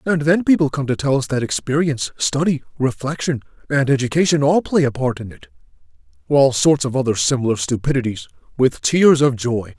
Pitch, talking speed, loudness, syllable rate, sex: 135 Hz, 180 wpm, -18 LUFS, 5.6 syllables/s, male